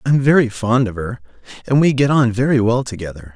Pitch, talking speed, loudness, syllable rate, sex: 120 Hz, 230 wpm, -16 LUFS, 6.1 syllables/s, male